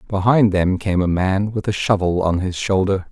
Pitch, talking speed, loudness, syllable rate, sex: 95 Hz, 210 wpm, -18 LUFS, 4.8 syllables/s, male